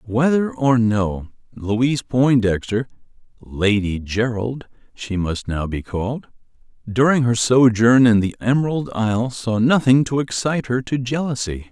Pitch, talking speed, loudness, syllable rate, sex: 120 Hz, 130 wpm, -19 LUFS, 4.4 syllables/s, male